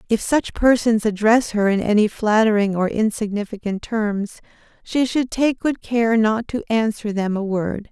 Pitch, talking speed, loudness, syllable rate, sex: 220 Hz, 165 wpm, -19 LUFS, 4.4 syllables/s, female